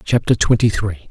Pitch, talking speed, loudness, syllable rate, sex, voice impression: 110 Hz, 160 wpm, -17 LUFS, 5.0 syllables/s, male, very masculine, slightly young, slightly thick, slightly relaxed, weak, dark, slightly soft, muffled, halting, slightly cool, very intellectual, refreshing, sincere, very calm, slightly mature, slightly friendly, slightly reassuring, very unique, slightly elegant, slightly wild, slightly sweet, slightly lively, kind, very modest